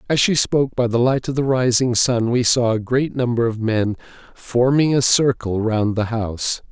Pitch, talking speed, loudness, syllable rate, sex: 120 Hz, 205 wpm, -18 LUFS, 4.8 syllables/s, male